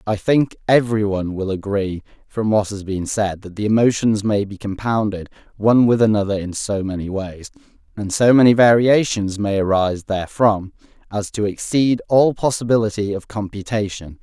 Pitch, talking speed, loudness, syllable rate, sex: 105 Hz, 155 wpm, -18 LUFS, 5.1 syllables/s, male